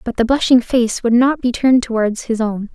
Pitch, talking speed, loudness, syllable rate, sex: 240 Hz, 240 wpm, -15 LUFS, 5.3 syllables/s, female